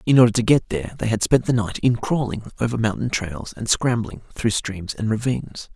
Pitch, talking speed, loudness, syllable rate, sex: 115 Hz, 220 wpm, -21 LUFS, 5.4 syllables/s, male